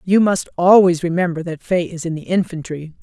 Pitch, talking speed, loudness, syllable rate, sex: 175 Hz, 200 wpm, -17 LUFS, 5.4 syllables/s, female